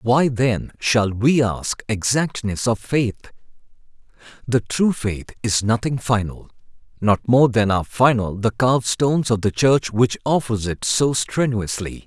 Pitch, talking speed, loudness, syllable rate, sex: 115 Hz, 150 wpm, -20 LUFS, 4.1 syllables/s, male